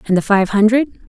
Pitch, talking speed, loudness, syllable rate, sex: 215 Hz, 205 wpm, -14 LUFS, 5.9 syllables/s, female